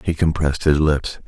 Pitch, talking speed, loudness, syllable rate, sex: 75 Hz, 190 wpm, -19 LUFS, 5.3 syllables/s, male